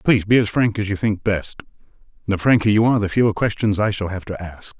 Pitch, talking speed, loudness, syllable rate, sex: 105 Hz, 250 wpm, -19 LUFS, 6.2 syllables/s, male